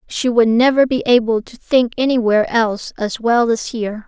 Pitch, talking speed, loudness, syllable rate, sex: 235 Hz, 190 wpm, -16 LUFS, 5.3 syllables/s, female